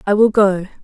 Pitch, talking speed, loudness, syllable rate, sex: 200 Hz, 215 wpm, -14 LUFS, 5.3 syllables/s, female